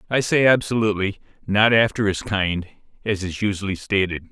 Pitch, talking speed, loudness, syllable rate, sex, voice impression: 100 Hz, 155 wpm, -20 LUFS, 5.4 syllables/s, male, very masculine, very adult-like, middle-aged, thick, tensed, powerful, slightly bright, slightly soft, clear, fluent, very cool, very intellectual, refreshing, sincere, calm, slightly mature, friendly, reassuring, slightly wild, slightly sweet, lively, very kind